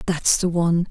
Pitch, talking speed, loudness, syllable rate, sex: 170 Hz, 200 wpm, -20 LUFS, 5.3 syllables/s, female